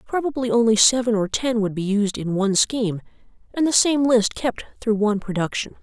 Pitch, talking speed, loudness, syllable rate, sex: 225 Hz, 195 wpm, -20 LUFS, 5.6 syllables/s, female